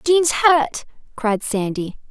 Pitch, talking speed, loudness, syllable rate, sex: 265 Hz, 115 wpm, -19 LUFS, 3.0 syllables/s, female